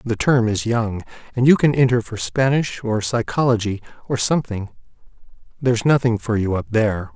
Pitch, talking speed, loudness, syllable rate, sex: 115 Hz, 170 wpm, -19 LUFS, 5.4 syllables/s, male